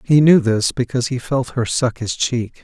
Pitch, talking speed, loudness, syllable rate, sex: 120 Hz, 230 wpm, -18 LUFS, 4.7 syllables/s, male